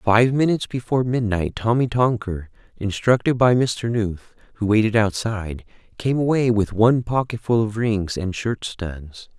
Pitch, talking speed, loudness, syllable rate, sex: 110 Hz, 145 wpm, -21 LUFS, 4.6 syllables/s, male